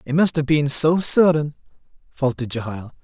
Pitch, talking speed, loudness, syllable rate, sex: 145 Hz, 160 wpm, -19 LUFS, 5.2 syllables/s, male